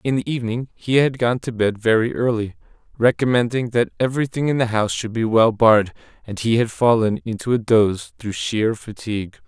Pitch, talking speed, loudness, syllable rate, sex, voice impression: 115 Hz, 190 wpm, -19 LUFS, 5.6 syllables/s, male, masculine, adult-like, slightly halting, sincere, slightly calm, friendly